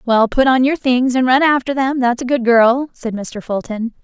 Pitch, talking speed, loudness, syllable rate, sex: 250 Hz, 240 wpm, -15 LUFS, 4.7 syllables/s, female